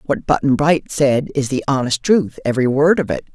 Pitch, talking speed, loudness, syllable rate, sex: 140 Hz, 195 wpm, -17 LUFS, 5.3 syllables/s, female